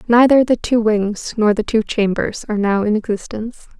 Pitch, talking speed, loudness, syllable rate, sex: 220 Hz, 190 wpm, -17 LUFS, 5.2 syllables/s, female